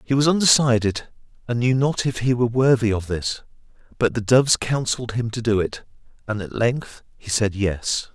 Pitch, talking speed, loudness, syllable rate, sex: 115 Hz, 190 wpm, -21 LUFS, 5.2 syllables/s, male